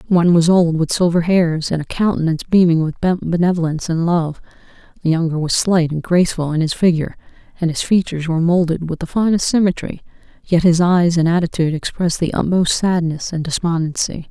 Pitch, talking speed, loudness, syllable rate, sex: 170 Hz, 180 wpm, -17 LUFS, 5.9 syllables/s, female